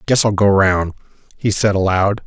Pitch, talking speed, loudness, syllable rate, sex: 100 Hz, 185 wpm, -16 LUFS, 4.7 syllables/s, male